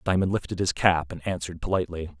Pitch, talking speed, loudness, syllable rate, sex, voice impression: 85 Hz, 190 wpm, -26 LUFS, 6.7 syllables/s, male, masculine, adult-like, tensed, powerful, bright, clear, fluent, cool, intellectual, refreshing, friendly, lively, kind, slightly light